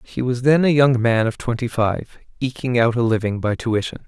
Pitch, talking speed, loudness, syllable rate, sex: 120 Hz, 220 wpm, -19 LUFS, 5.1 syllables/s, male